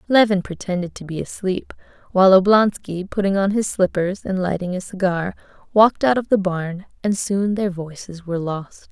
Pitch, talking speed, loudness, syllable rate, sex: 190 Hz, 175 wpm, -20 LUFS, 5.1 syllables/s, female